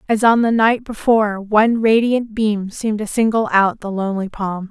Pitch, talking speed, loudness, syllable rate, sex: 215 Hz, 190 wpm, -17 LUFS, 5.1 syllables/s, female